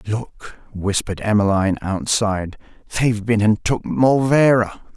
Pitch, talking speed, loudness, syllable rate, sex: 110 Hz, 110 wpm, -19 LUFS, 4.9 syllables/s, male